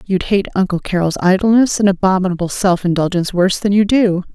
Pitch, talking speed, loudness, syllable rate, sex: 190 Hz, 180 wpm, -15 LUFS, 6.1 syllables/s, female